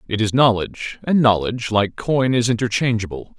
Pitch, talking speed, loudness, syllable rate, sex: 115 Hz, 160 wpm, -19 LUFS, 5.4 syllables/s, male